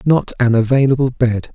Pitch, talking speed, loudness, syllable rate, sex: 125 Hz, 155 wpm, -15 LUFS, 5.1 syllables/s, male